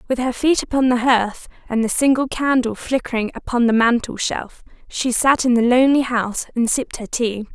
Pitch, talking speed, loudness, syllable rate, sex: 245 Hz, 200 wpm, -18 LUFS, 5.3 syllables/s, female